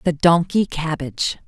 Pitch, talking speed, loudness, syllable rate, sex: 160 Hz, 120 wpm, -20 LUFS, 4.7 syllables/s, female